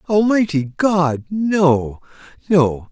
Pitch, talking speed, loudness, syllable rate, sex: 165 Hz, 60 wpm, -17 LUFS, 3.2 syllables/s, male